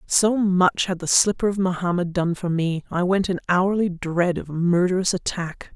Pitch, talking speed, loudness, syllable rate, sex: 180 Hz, 190 wpm, -21 LUFS, 4.6 syllables/s, female